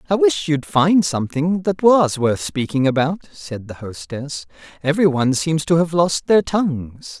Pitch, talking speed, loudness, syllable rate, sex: 150 Hz, 175 wpm, -18 LUFS, 4.6 syllables/s, male